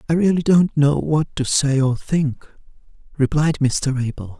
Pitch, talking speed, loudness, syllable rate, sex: 145 Hz, 165 wpm, -19 LUFS, 4.2 syllables/s, male